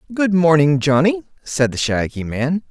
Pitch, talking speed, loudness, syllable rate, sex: 160 Hz, 155 wpm, -17 LUFS, 4.6 syllables/s, male